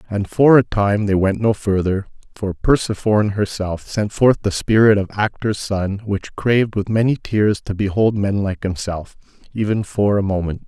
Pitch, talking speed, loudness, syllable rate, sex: 105 Hz, 180 wpm, -18 LUFS, 4.7 syllables/s, male